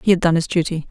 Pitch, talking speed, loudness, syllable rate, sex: 170 Hz, 330 wpm, -18 LUFS, 7.4 syllables/s, female